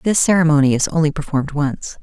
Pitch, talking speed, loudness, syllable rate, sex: 155 Hz, 180 wpm, -17 LUFS, 6.3 syllables/s, female